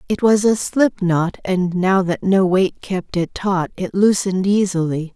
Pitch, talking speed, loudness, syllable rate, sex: 190 Hz, 185 wpm, -18 LUFS, 4.1 syllables/s, female